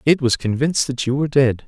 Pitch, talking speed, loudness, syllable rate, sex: 135 Hz, 250 wpm, -18 LUFS, 6.5 syllables/s, male